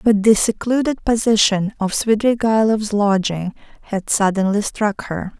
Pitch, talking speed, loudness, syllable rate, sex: 210 Hz, 120 wpm, -18 LUFS, 4.3 syllables/s, female